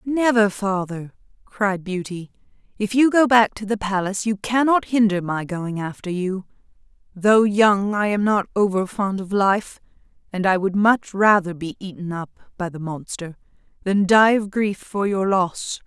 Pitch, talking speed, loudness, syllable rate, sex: 200 Hz, 170 wpm, -20 LUFS, 4.4 syllables/s, female